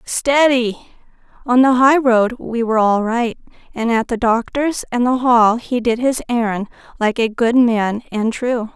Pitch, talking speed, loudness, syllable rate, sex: 235 Hz, 170 wpm, -16 LUFS, 4.2 syllables/s, female